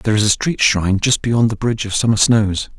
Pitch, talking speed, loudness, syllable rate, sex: 110 Hz, 260 wpm, -16 LUFS, 6.0 syllables/s, male